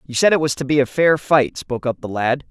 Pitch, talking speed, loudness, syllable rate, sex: 140 Hz, 310 wpm, -18 LUFS, 6.0 syllables/s, male